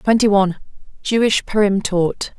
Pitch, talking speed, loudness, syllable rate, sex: 205 Hz, 100 wpm, -17 LUFS, 5.2 syllables/s, female